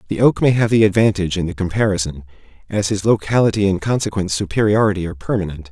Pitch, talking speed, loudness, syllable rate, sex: 100 Hz, 180 wpm, -17 LUFS, 6.9 syllables/s, male